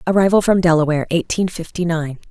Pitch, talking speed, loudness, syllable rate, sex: 170 Hz, 155 wpm, -17 LUFS, 6.3 syllables/s, female